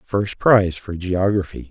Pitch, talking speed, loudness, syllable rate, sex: 95 Hz, 140 wpm, -19 LUFS, 4.4 syllables/s, male